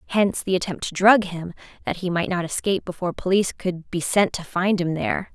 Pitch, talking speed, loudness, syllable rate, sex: 185 Hz, 225 wpm, -22 LUFS, 6.0 syllables/s, female